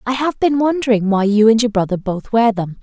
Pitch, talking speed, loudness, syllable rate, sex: 225 Hz, 255 wpm, -16 LUFS, 5.6 syllables/s, female